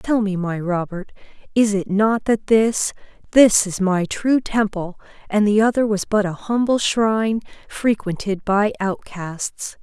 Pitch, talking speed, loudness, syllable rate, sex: 205 Hz, 155 wpm, -19 LUFS, 4.0 syllables/s, female